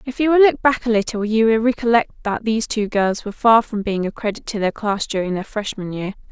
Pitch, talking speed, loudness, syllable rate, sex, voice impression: 220 Hz, 255 wpm, -19 LUFS, 5.9 syllables/s, female, feminine, adult-like, slightly clear, slightly intellectual, friendly